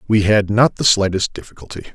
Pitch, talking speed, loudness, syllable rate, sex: 100 Hz, 185 wpm, -15 LUFS, 5.9 syllables/s, male